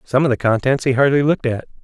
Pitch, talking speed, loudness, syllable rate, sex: 130 Hz, 260 wpm, -17 LUFS, 6.9 syllables/s, male